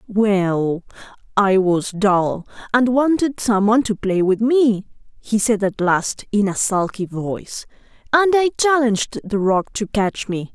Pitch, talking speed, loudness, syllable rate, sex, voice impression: 215 Hz, 150 wpm, -18 LUFS, 3.9 syllables/s, female, feminine, middle-aged, tensed, powerful, slightly bright, clear, slightly raspy, intellectual, friendly, lively, slightly intense